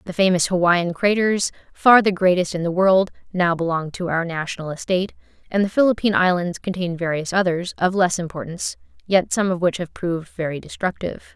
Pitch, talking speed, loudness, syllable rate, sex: 180 Hz, 180 wpm, -20 LUFS, 5.7 syllables/s, female